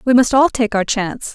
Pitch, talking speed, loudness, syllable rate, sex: 235 Hz, 265 wpm, -16 LUFS, 5.6 syllables/s, female